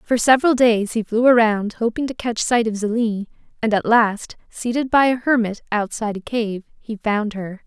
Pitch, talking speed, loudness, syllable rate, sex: 225 Hz, 195 wpm, -19 LUFS, 4.9 syllables/s, female